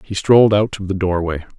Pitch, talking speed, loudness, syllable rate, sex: 100 Hz, 225 wpm, -16 LUFS, 5.8 syllables/s, male